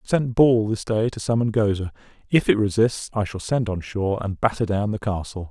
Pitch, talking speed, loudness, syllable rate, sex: 105 Hz, 240 wpm, -22 LUFS, 5.7 syllables/s, male